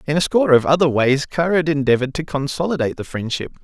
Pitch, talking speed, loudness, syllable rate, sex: 145 Hz, 215 wpm, -18 LUFS, 7.1 syllables/s, male